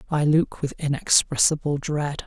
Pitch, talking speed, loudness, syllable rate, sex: 145 Hz, 130 wpm, -22 LUFS, 4.5 syllables/s, male